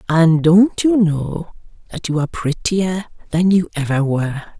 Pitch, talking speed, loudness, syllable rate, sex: 170 Hz, 155 wpm, -17 LUFS, 4.4 syllables/s, female